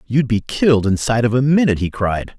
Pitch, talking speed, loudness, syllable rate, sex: 120 Hz, 225 wpm, -17 LUFS, 6.2 syllables/s, male